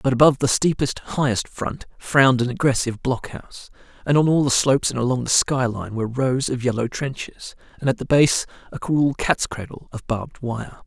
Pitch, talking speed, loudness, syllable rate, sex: 130 Hz, 205 wpm, -21 LUFS, 5.4 syllables/s, male